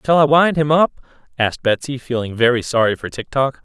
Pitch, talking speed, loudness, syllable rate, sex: 130 Hz, 215 wpm, -17 LUFS, 5.9 syllables/s, male